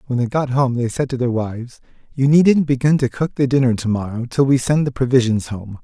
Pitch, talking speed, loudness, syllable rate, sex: 130 Hz, 245 wpm, -18 LUFS, 5.6 syllables/s, male